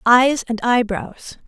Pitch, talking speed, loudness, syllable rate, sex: 240 Hz, 120 wpm, -18 LUFS, 3.3 syllables/s, female